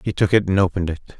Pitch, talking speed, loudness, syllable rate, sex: 95 Hz, 300 wpm, -19 LUFS, 8.5 syllables/s, male